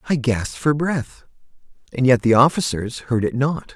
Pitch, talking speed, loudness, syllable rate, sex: 130 Hz, 160 wpm, -19 LUFS, 4.9 syllables/s, male